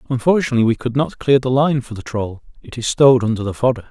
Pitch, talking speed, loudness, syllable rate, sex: 125 Hz, 230 wpm, -17 LUFS, 6.9 syllables/s, male